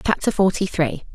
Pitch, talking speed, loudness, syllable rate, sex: 175 Hz, 160 wpm, -21 LUFS, 5.4 syllables/s, female